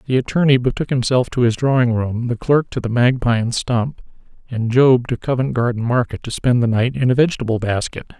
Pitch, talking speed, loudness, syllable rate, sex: 125 Hz, 210 wpm, -18 LUFS, 5.6 syllables/s, male